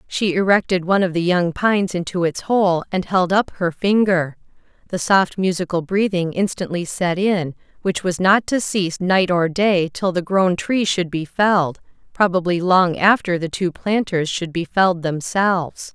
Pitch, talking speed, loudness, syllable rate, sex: 180 Hz, 175 wpm, -19 LUFS, 4.6 syllables/s, female